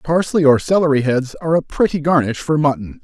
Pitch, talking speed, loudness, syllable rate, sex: 145 Hz, 200 wpm, -16 LUFS, 6.0 syllables/s, male